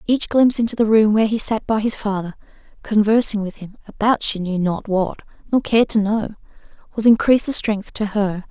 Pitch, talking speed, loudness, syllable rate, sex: 210 Hz, 200 wpm, -18 LUFS, 5.7 syllables/s, female